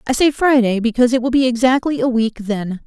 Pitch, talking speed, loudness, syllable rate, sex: 240 Hz, 230 wpm, -16 LUFS, 6.0 syllables/s, female